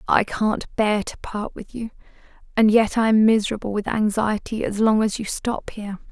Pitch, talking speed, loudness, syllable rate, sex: 215 Hz, 195 wpm, -21 LUFS, 5.0 syllables/s, female